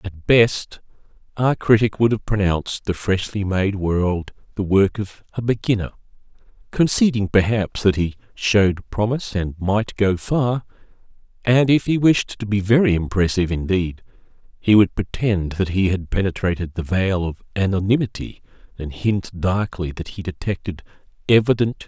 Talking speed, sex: 160 wpm, male